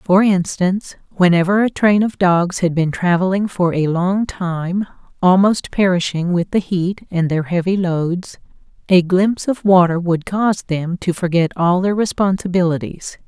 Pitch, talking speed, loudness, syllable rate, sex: 180 Hz, 160 wpm, -17 LUFS, 4.5 syllables/s, female